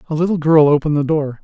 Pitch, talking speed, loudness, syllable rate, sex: 155 Hz, 250 wpm, -15 LUFS, 7.3 syllables/s, male